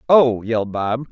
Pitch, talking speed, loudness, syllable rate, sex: 120 Hz, 160 wpm, -18 LUFS, 4.4 syllables/s, male